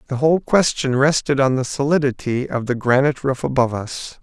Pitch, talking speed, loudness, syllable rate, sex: 135 Hz, 185 wpm, -19 LUFS, 5.8 syllables/s, male